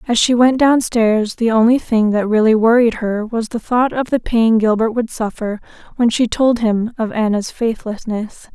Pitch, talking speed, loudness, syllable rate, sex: 225 Hz, 190 wpm, -16 LUFS, 4.5 syllables/s, female